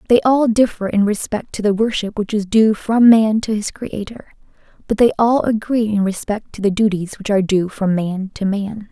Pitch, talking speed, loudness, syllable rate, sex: 210 Hz, 215 wpm, -17 LUFS, 5.0 syllables/s, female